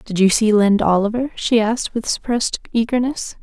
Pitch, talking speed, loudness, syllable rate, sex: 225 Hz, 175 wpm, -18 LUFS, 5.8 syllables/s, female